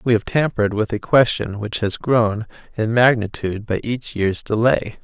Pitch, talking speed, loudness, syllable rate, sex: 110 Hz, 180 wpm, -19 LUFS, 4.7 syllables/s, male